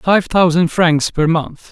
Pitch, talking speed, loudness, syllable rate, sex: 165 Hz, 175 wpm, -14 LUFS, 3.6 syllables/s, male